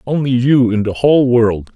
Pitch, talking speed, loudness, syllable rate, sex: 120 Hz, 205 wpm, -13 LUFS, 5.0 syllables/s, male